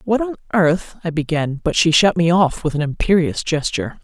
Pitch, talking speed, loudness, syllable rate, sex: 165 Hz, 210 wpm, -18 LUFS, 5.4 syllables/s, female